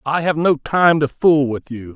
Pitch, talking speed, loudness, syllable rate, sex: 145 Hz, 245 wpm, -16 LUFS, 4.4 syllables/s, male